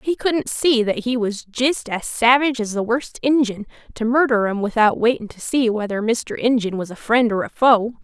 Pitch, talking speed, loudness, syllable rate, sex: 235 Hz, 215 wpm, -19 LUFS, 4.9 syllables/s, female